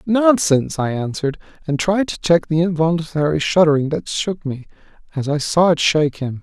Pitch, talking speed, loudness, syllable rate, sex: 155 Hz, 180 wpm, -18 LUFS, 5.4 syllables/s, male